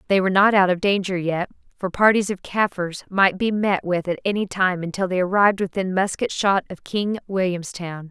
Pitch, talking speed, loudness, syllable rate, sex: 190 Hz, 200 wpm, -21 LUFS, 5.3 syllables/s, female